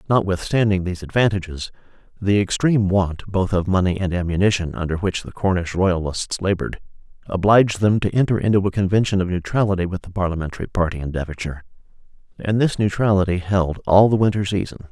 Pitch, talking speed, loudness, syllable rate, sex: 95 Hz, 160 wpm, -20 LUFS, 6.2 syllables/s, male